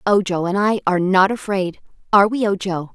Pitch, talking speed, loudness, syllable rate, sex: 195 Hz, 185 wpm, -18 LUFS, 5.8 syllables/s, female